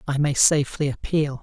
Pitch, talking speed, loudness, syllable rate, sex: 145 Hz, 170 wpm, -21 LUFS, 5.4 syllables/s, male